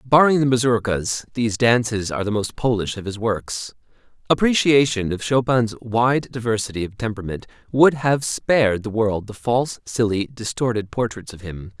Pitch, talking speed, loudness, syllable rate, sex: 115 Hz, 155 wpm, -20 LUFS, 5.0 syllables/s, male